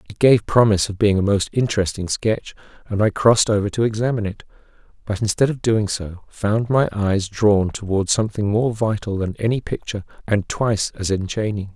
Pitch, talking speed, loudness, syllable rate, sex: 105 Hz, 185 wpm, -20 LUFS, 5.6 syllables/s, male